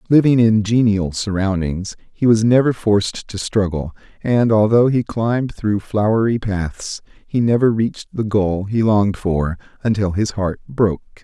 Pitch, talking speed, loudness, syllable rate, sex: 105 Hz, 155 wpm, -18 LUFS, 4.5 syllables/s, male